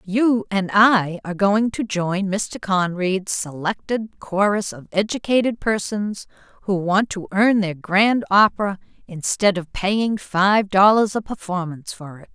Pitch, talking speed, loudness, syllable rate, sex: 200 Hz, 145 wpm, -20 LUFS, 4.1 syllables/s, female